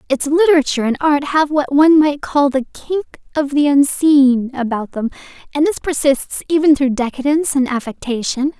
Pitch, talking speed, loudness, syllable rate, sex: 285 Hz, 170 wpm, -15 LUFS, 5.3 syllables/s, female